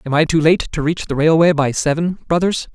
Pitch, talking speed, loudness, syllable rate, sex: 160 Hz, 240 wpm, -16 LUFS, 5.7 syllables/s, male